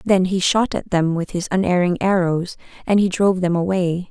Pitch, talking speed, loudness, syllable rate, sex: 185 Hz, 205 wpm, -19 LUFS, 5.2 syllables/s, female